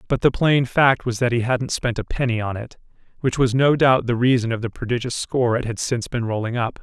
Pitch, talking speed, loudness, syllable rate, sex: 120 Hz, 255 wpm, -20 LUFS, 5.8 syllables/s, male